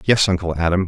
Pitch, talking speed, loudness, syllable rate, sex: 90 Hz, 205 wpm, -18 LUFS, 6.5 syllables/s, male